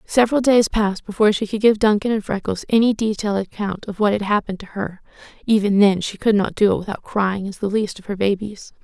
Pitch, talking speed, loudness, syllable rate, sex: 205 Hz, 230 wpm, -19 LUFS, 6.1 syllables/s, female